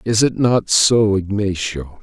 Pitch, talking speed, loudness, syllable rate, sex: 105 Hz, 150 wpm, -16 LUFS, 3.7 syllables/s, male